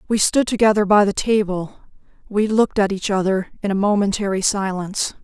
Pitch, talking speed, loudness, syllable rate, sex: 200 Hz, 170 wpm, -19 LUFS, 5.7 syllables/s, female